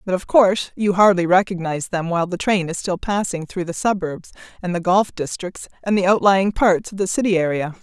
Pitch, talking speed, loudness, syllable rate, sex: 185 Hz, 215 wpm, -19 LUFS, 5.6 syllables/s, female